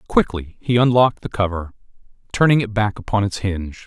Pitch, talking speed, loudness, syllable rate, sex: 105 Hz, 170 wpm, -19 LUFS, 5.9 syllables/s, male